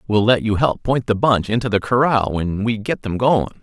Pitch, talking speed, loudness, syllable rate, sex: 110 Hz, 250 wpm, -18 LUFS, 5.2 syllables/s, male